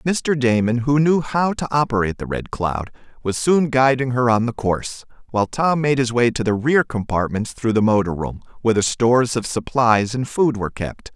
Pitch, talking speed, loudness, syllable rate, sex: 120 Hz, 210 wpm, -19 LUFS, 5.2 syllables/s, male